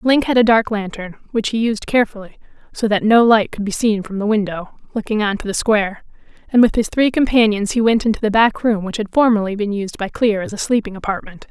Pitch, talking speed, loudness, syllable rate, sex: 215 Hz, 240 wpm, -17 LUFS, 6.0 syllables/s, female